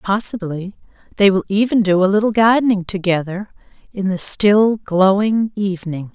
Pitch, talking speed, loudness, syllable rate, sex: 200 Hz, 135 wpm, -16 LUFS, 4.8 syllables/s, female